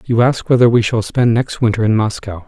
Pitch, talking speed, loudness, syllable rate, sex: 115 Hz, 245 wpm, -14 LUFS, 5.5 syllables/s, male